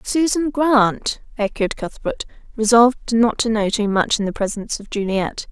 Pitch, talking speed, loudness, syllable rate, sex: 225 Hz, 165 wpm, -19 LUFS, 4.6 syllables/s, female